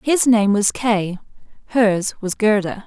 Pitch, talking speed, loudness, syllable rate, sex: 215 Hz, 145 wpm, -18 LUFS, 3.6 syllables/s, female